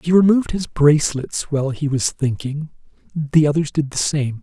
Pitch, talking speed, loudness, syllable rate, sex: 150 Hz, 175 wpm, -19 LUFS, 5.4 syllables/s, male